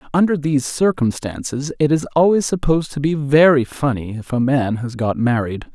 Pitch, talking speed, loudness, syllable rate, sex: 140 Hz, 180 wpm, -18 LUFS, 5.3 syllables/s, male